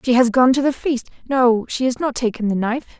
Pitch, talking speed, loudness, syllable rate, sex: 245 Hz, 260 wpm, -18 LUFS, 6.0 syllables/s, female